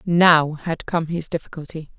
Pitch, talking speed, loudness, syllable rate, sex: 160 Hz, 150 wpm, -20 LUFS, 4.4 syllables/s, female